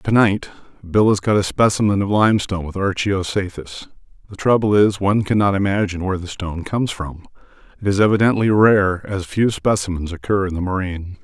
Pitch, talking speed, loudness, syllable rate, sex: 100 Hz, 175 wpm, -18 LUFS, 5.9 syllables/s, male